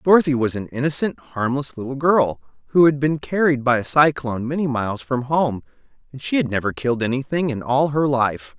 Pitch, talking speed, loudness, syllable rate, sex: 135 Hz, 195 wpm, -20 LUFS, 5.6 syllables/s, male